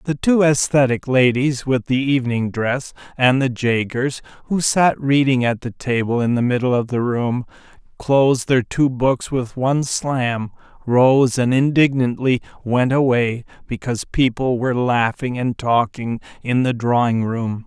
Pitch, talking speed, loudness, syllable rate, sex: 125 Hz, 155 wpm, -18 LUFS, 4.3 syllables/s, male